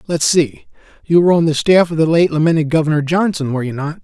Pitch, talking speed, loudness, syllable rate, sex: 160 Hz, 240 wpm, -15 LUFS, 6.6 syllables/s, male